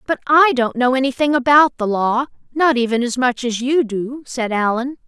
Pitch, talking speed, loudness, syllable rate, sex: 255 Hz, 200 wpm, -17 LUFS, 4.9 syllables/s, female